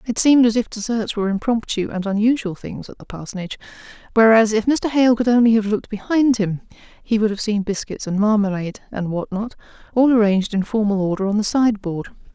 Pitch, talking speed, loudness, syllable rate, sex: 215 Hz, 200 wpm, -19 LUFS, 6.2 syllables/s, female